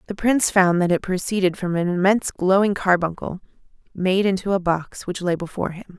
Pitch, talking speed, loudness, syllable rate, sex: 185 Hz, 190 wpm, -21 LUFS, 5.8 syllables/s, female